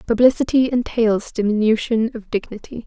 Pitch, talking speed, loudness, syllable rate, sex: 225 Hz, 105 wpm, -19 LUFS, 5.2 syllables/s, female